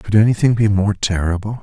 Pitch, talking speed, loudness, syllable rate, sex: 105 Hz, 185 wpm, -16 LUFS, 5.7 syllables/s, male